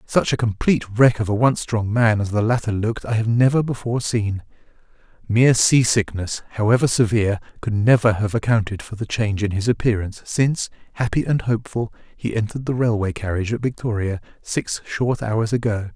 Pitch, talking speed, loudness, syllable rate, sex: 110 Hz, 180 wpm, -20 LUFS, 5.8 syllables/s, male